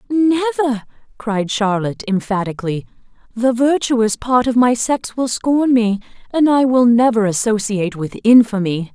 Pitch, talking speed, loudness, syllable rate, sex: 230 Hz, 135 wpm, -16 LUFS, 4.8 syllables/s, female